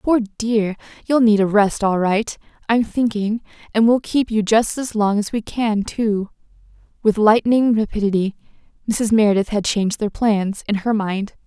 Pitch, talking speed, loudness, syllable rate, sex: 215 Hz, 165 wpm, -19 LUFS, 4.5 syllables/s, female